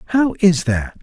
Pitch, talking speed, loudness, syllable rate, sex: 170 Hz, 175 wpm, -17 LUFS, 4.2 syllables/s, male